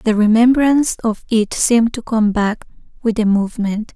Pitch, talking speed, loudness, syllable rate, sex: 225 Hz, 165 wpm, -16 LUFS, 5.0 syllables/s, female